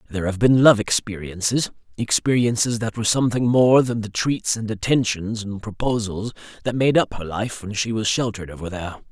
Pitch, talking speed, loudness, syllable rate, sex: 110 Hz, 185 wpm, -21 LUFS, 5.6 syllables/s, male